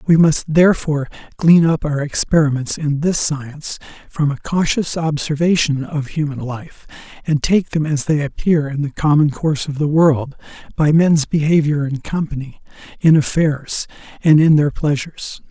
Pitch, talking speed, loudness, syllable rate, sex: 150 Hz, 160 wpm, -17 LUFS, 4.8 syllables/s, male